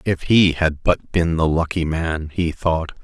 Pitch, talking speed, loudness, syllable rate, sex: 80 Hz, 200 wpm, -19 LUFS, 3.8 syllables/s, male